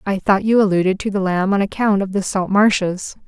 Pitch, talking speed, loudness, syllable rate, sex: 195 Hz, 240 wpm, -17 LUFS, 5.5 syllables/s, female